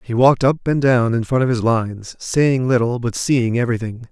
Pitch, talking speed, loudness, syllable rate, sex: 120 Hz, 220 wpm, -17 LUFS, 5.3 syllables/s, male